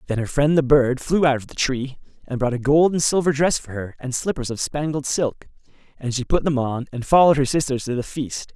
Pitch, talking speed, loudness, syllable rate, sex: 135 Hz, 255 wpm, -21 LUFS, 5.6 syllables/s, male